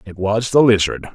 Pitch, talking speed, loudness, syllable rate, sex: 100 Hz, 210 wpm, -16 LUFS, 4.8 syllables/s, male